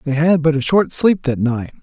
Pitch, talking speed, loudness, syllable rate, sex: 150 Hz, 260 wpm, -16 LUFS, 4.9 syllables/s, male